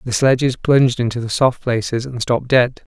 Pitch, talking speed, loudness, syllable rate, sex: 125 Hz, 205 wpm, -17 LUFS, 5.5 syllables/s, male